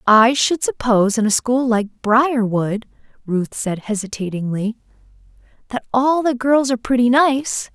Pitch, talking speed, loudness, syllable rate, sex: 235 Hz, 140 wpm, -18 LUFS, 4.4 syllables/s, female